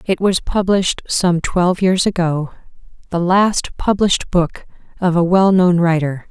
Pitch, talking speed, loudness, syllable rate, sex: 180 Hz, 145 wpm, -16 LUFS, 4.4 syllables/s, female